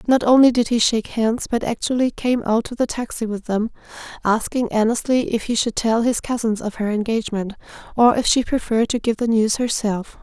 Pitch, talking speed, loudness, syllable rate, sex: 230 Hz, 205 wpm, -20 LUFS, 5.5 syllables/s, female